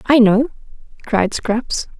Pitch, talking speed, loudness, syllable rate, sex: 235 Hz, 120 wpm, -17 LUFS, 3.2 syllables/s, female